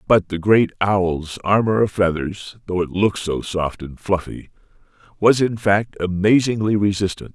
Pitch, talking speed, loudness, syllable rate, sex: 100 Hz, 155 wpm, -19 LUFS, 4.4 syllables/s, male